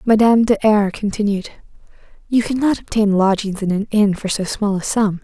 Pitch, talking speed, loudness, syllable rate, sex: 210 Hz, 185 wpm, -17 LUFS, 5.2 syllables/s, female